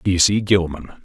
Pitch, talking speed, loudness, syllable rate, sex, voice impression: 95 Hz, 175 wpm, -17 LUFS, 5.1 syllables/s, male, masculine, adult-like, thick, tensed, powerful, clear, slightly halting, slightly cool, calm, slightly mature, wild, lively, slightly intense